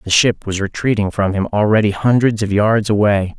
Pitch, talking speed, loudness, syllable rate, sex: 105 Hz, 195 wpm, -16 LUFS, 5.2 syllables/s, male